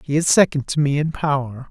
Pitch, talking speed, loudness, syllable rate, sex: 140 Hz, 245 wpm, -19 LUFS, 5.7 syllables/s, male